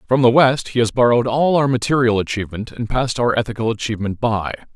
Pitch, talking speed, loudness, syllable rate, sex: 120 Hz, 200 wpm, -18 LUFS, 6.6 syllables/s, male